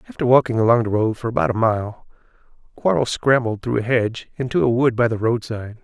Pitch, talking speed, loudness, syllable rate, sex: 115 Hz, 205 wpm, -19 LUFS, 6.2 syllables/s, male